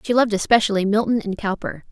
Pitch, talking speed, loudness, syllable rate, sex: 210 Hz, 190 wpm, -20 LUFS, 6.7 syllables/s, female